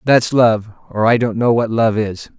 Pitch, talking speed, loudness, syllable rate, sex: 115 Hz, 225 wpm, -15 LUFS, 4.3 syllables/s, male